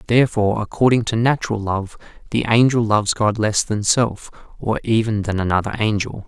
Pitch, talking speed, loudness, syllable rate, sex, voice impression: 110 Hz, 160 wpm, -19 LUFS, 5.6 syllables/s, male, masculine, adult-like, slightly thin, tensed, slightly dark, clear, slightly nasal, cool, sincere, calm, slightly unique, slightly kind, modest